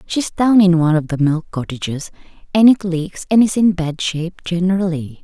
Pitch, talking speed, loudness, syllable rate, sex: 175 Hz, 195 wpm, -16 LUFS, 5.3 syllables/s, female